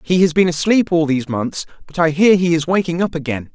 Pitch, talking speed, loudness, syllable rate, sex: 165 Hz, 255 wpm, -16 LUFS, 5.9 syllables/s, male